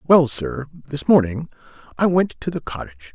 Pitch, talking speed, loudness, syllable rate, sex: 140 Hz, 170 wpm, -20 LUFS, 5.0 syllables/s, male